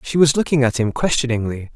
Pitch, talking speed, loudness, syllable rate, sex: 130 Hz, 205 wpm, -18 LUFS, 6.1 syllables/s, male